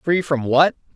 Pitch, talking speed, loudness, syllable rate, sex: 150 Hz, 190 wpm, -18 LUFS, 4.1 syllables/s, male